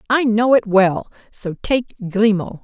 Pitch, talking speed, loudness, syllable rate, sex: 210 Hz, 160 wpm, -17 LUFS, 3.9 syllables/s, female